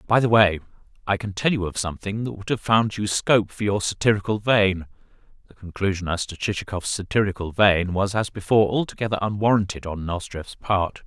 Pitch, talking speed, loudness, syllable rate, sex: 100 Hz, 185 wpm, -22 LUFS, 2.9 syllables/s, male